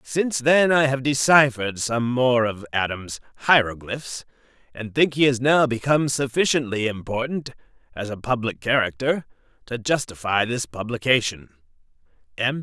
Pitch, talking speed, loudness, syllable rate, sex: 125 Hz, 125 wpm, -21 LUFS, 4.9 syllables/s, male